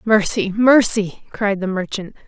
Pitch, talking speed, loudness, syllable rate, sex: 205 Hz, 130 wpm, -18 LUFS, 4.0 syllables/s, female